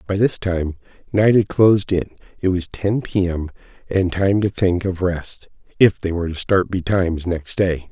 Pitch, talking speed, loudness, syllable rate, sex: 95 Hz, 195 wpm, -19 LUFS, 4.7 syllables/s, male